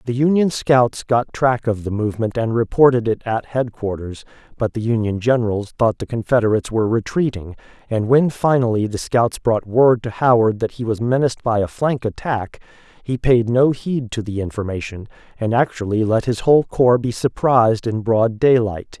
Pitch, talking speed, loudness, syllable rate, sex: 115 Hz, 180 wpm, -18 LUFS, 5.1 syllables/s, male